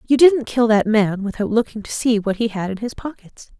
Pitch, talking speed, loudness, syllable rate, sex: 225 Hz, 250 wpm, -18 LUFS, 5.3 syllables/s, female